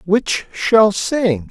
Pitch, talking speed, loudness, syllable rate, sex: 200 Hz, 120 wpm, -16 LUFS, 2.3 syllables/s, male